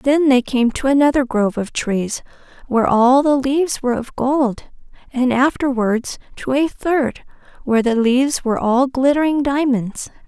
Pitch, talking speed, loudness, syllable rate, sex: 260 Hz, 160 wpm, -17 LUFS, 4.7 syllables/s, female